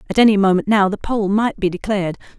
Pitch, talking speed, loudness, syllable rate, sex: 205 Hz, 225 wpm, -17 LUFS, 6.5 syllables/s, female